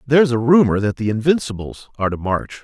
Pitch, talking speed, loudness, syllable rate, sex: 120 Hz, 225 wpm, -18 LUFS, 6.6 syllables/s, male